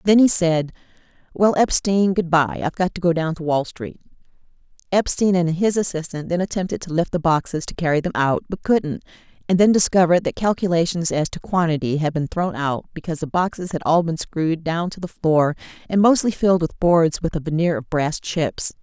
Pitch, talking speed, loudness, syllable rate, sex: 170 Hz, 205 wpm, -20 LUFS, 5.5 syllables/s, female